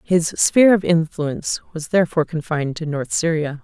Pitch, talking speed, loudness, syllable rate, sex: 165 Hz, 165 wpm, -19 LUFS, 5.6 syllables/s, female